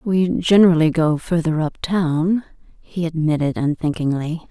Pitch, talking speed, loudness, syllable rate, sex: 165 Hz, 120 wpm, -19 LUFS, 4.3 syllables/s, female